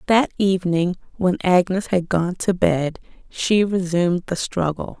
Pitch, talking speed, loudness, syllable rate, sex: 180 Hz, 145 wpm, -20 LUFS, 4.4 syllables/s, female